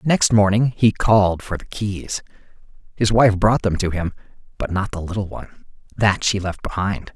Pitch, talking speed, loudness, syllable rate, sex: 100 Hz, 185 wpm, -20 LUFS, 4.9 syllables/s, male